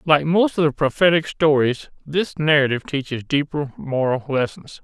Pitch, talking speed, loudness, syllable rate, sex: 145 Hz, 150 wpm, -20 LUFS, 4.9 syllables/s, male